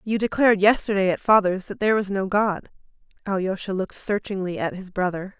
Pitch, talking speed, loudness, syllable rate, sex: 195 Hz, 180 wpm, -22 LUFS, 5.9 syllables/s, female